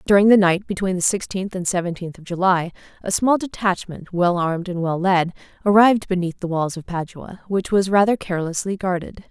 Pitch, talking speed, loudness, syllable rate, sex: 185 Hz, 185 wpm, -20 LUFS, 5.5 syllables/s, female